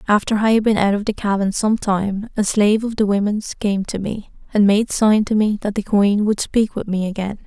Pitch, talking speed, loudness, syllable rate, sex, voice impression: 205 Hz, 250 wpm, -18 LUFS, 5.2 syllables/s, female, very feminine, slightly young, slightly adult-like, thin, slightly relaxed, slightly weak, slightly dark, very soft, muffled, slightly halting, slightly raspy, very cute, intellectual, slightly refreshing, very sincere, very calm, very friendly, very reassuring, unique, very elegant, very sweet, kind, very modest